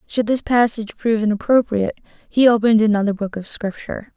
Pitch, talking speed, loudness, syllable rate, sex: 220 Hz, 160 wpm, -18 LUFS, 6.3 syllables/s, female